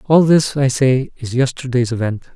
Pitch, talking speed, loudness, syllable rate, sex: 130 Hz, 180 wpm, -16 LUFS, 4.7 syllables/s, male